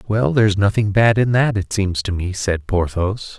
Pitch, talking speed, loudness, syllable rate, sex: 100 Hz, 215 wpm, -18 LUFS, 4.6 syllables/s, male